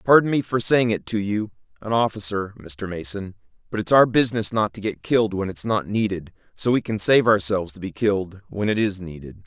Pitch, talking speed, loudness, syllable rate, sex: 100 Hz, 220 wpm, -22 LUFS, 5.6 syllables/s, male